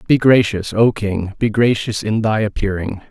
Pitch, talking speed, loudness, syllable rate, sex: 105 Hz, 175 wpm, -17 LUFS, 4.6 syllables/s, male